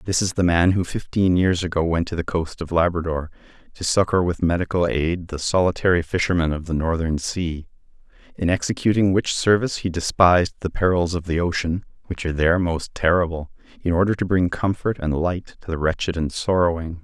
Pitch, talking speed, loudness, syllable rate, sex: 85 Hz, 190 wpm, -21 LUFS, 5.6 syllables/s, male